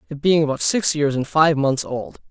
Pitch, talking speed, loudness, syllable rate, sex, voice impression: 145 Hz, 235 wpm, -19 LUFS, 4.9 syllables/s, male, very masculine, very adult-like, thick, very tensed, slightly powerful, bright, hard, clear, slightly halting, raspy, cool, slightly intellectual, very refreshing, very sincere, calm, mature, friendly, reassuring, unique, slightly elegant, wild, sweet, very lively, kind, slightly intense, slightly sharp